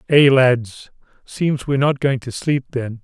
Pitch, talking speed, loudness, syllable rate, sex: 130 Hz, 180 wpm, -18 LUFS, 4.1 syllables/s, male